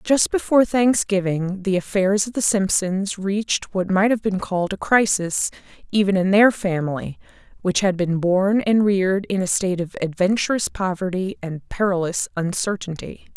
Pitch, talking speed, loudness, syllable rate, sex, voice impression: 195 Hz, 155 wpm, -20 LUFS, 4.8 syllables/s, female, feminine, adult-like, clear, sincere, calm, friendly, slightly kind